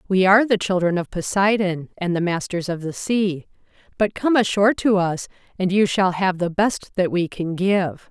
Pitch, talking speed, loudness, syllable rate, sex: 185 Hz, 200 wpm, -20 LUFS, 4.9 syllables/s, female